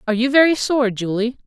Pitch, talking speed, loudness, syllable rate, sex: 245 Hz, 205 wpm, -17 LUFS, 6.5 syllables/s, female